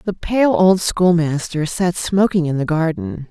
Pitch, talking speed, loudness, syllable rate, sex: 175 Hz, 165 wpm, -17 LUFS, 4.1 syllables/s, female